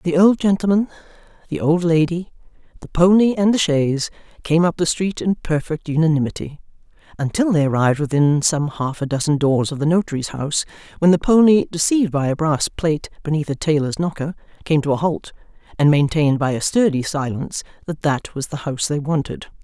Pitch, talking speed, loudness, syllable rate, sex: 160 Hz, 185 wpm, -19 LUFS, 5.8 syllables/s, female